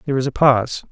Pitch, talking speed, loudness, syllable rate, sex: 130 Hz, 265 wpm, -17 LUFS, 8.5 syllables/s, male